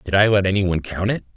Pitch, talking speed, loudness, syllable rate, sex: 100 Hz, 310 wpm, -19 LUFS, 7.6 syllables/s, male